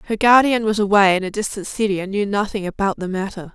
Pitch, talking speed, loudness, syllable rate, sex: 200 Hz, 235 wpm, -18 LUFS, 6.3 syllables/s, female